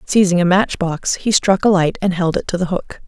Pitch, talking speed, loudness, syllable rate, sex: 180 Hz, 275 wpm, -16 LUFS, 5.2 syllables/s, female